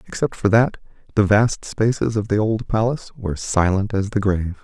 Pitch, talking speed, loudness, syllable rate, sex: 105 Hz, 195 wpm, -20 LUFS, 5.5 syllables/s, male